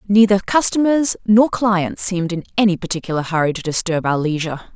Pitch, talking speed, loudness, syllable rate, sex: 190 Hz, 165 wpm, -17 LUFS, 5.9 syllables/s, female